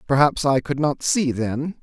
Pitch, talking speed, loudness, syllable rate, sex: 140 Hz, 195 wpm, -21 LUFS, 4.2 syllables/s, male